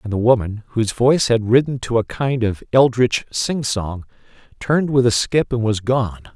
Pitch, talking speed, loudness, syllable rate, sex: 120 Hz, 200 wpm, -18 LUFS, 5.0 syllables/s, male